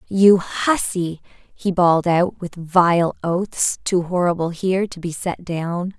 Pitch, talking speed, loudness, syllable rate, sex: 180 Hz, 150 wpm, -19 LUFS, 3.6 syllables/s, female